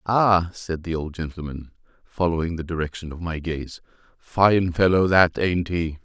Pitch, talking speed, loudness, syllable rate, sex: 85 Hz, 160 wpm, -22 LUFS, 4.5 syllables/s, male